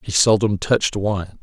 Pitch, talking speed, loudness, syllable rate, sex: 100 Hz, 170 wpm, -19 LUFS, 4.6 syllables/s, male